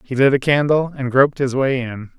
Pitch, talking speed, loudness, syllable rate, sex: 135 Hz, 245 wpm, -17 LUFS, 5.5 syllables/s, male